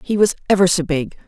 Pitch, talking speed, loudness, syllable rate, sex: 180 Hz, 235 wpm, -17 LUFS, 6.3 syllables/s, female